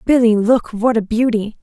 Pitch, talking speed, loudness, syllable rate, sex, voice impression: 225 Hz, 185 wpm, -15 LUFS, 4.8 syllables/s, female, feminine, adult-like, tensed, powerful, bright, soft, clear, fluent, intellectual, calm, friendly, reassuring, elegant, lively, kind